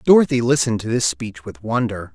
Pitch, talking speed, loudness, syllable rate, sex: 115 Hz, 195 wpm, -19 LUFS, 5.9 syllables/s, male